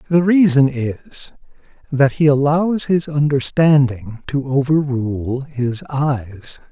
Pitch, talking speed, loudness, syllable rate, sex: 140 Hz, 100 wpm, -17 LUFS, 3.5 syllables/s, male